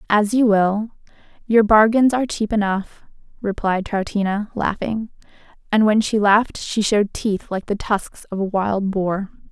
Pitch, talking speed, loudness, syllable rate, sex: 210 Hz, 160 wpm, -19 LUFS, 4.5 syllables/s, female